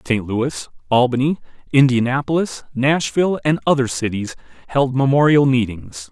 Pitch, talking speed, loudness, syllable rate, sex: 130 Hz, 110 wpm, -18 LUFS, 4.9 syllables/s, male